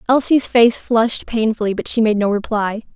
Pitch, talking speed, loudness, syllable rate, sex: 225 Hz, 185 wpm, -17 LUFS, 5.2 syllables/s, female